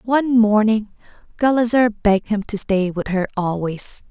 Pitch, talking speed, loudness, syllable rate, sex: 215 Hz, 145 wpm, -18 LUFS, 4.6 syllables/s, female